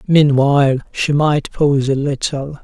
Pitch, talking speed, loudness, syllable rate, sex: 140 Hz, 135 wpm, -15 LUFS, 4.2 syllables/s, male